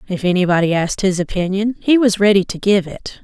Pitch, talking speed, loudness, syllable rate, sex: 195 Hz, 205 wpm, -16 LUFS, 5.9 syllables/s, female